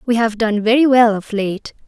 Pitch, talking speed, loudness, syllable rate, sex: 225 Hz, 225 wpm, -15 LUFS, 4.8 syllables/s, female